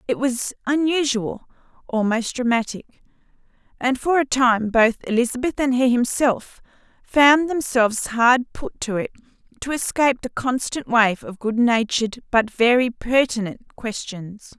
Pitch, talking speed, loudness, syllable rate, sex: 245 Hz, 130 wpm, -20 LUFS, 4.4 syllables/s, female